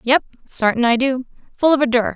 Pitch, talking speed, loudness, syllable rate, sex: 255 Hz, 225 wpm, -17 LUFS, 5.7 syllables/s, female